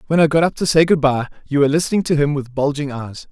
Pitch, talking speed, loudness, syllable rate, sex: 145 Hz, 290 wpm, -17 LUFS, 6.9 syllables/s, male